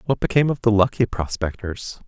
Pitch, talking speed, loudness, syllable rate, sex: 110 Hz, 175 wpm, -21 LUFS, 5.8 syllables/s, male